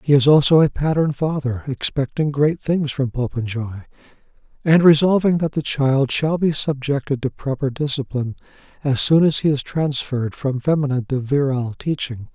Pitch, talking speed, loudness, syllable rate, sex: 140 Hz, 160 wpm, -19 LUFS, 5.2 syllables/s, male